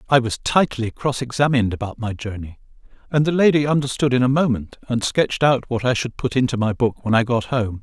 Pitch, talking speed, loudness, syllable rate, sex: 125 Hz, 220 wpm, -20 LUFS, 5.8 syllables/s, male